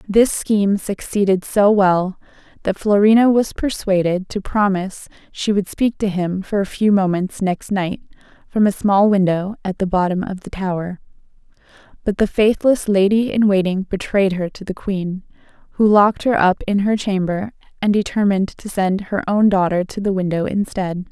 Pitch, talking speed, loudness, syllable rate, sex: 195 Hz, 175 wpm, -18 LUFS, 4.9 syllables/s, female